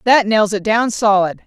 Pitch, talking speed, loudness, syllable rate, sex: 215 Hz, 205 wpm, -15 LUFS, 4.6 syllables/s, female